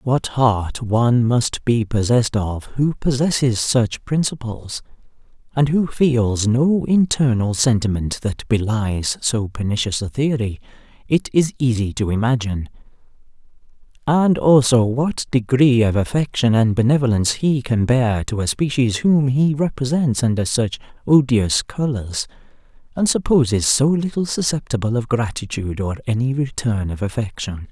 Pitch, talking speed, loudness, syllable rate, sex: 120 Hz, 130 wpm, -19 LUFS, 4.5 syllables/s, male